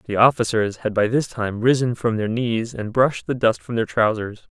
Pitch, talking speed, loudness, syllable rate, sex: 115 Hz, 225 wpm, -21 LUFS, 5.1 syllables/s, male